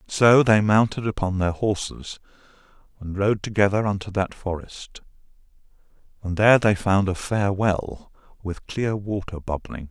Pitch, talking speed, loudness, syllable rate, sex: 100 Hz, 140 wpm, -22 LUFS, 4.4 syllables/s, male